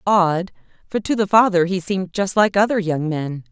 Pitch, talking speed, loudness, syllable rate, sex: 190 Hz, 205 wpm, -19 LUFS, 5.0 syllables/s, female